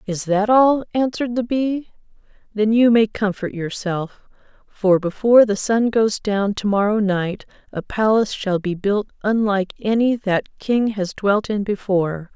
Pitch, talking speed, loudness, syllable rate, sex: 210 Hz, 160 wpm, -19 LUFS, 4.5 syllables/s, female